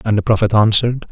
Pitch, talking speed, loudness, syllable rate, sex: 110 Hz, 215 wpm, -14 LUFS, 6.9 syllables/s, male